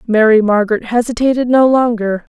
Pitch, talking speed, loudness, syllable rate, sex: 230 Hz, 130 wpm, -13 LUFS, 5.6 syllables/s, female